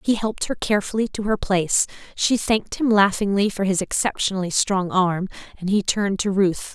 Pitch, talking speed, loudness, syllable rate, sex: 200 Hz, 185 wpm, -21 LUFS, 5.6 syllables/s, female